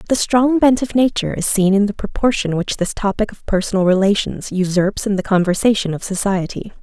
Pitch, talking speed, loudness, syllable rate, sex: 200 Hz, 195 wpm, -17 LUFS, 5.6 syllables/s, female